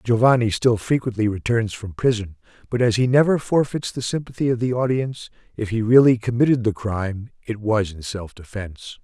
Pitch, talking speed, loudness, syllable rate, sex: 115 Hz, 180 wpm, -21 LUFS, 5.5 syllables/s, male